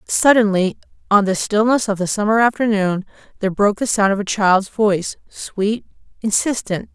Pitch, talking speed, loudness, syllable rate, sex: 205 Hz, 155 wpm, -17 LUFS, 5.2 syllables/s, female